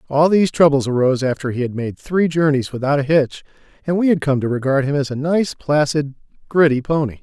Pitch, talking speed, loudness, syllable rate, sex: 145 Hz, 215 wpm, -18 LUFS, 5.9 syllables/s, male